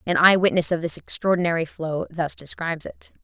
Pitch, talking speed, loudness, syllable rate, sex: 165 Hz, 185 wpm, -22 LUFS, 5.7 syllables/s, female